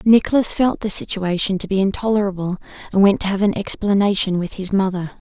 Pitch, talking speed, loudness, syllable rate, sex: 195 Hz, 180 wpm, -18 LUFS, 5.9 syllables/s, female